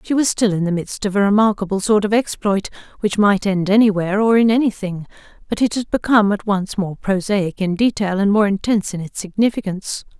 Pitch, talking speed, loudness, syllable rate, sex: 200 Hz, 205 wpm, -18 LUFS, 5.8 syllables/s, female